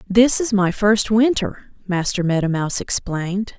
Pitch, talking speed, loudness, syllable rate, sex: 200 Hz, 150 wpm, -19 LUFS, 4.6 syllables/s, female